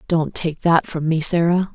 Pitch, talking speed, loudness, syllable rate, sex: 165 Hz, 205 wpm, -18 LUFS, 4.5 syllables/s, female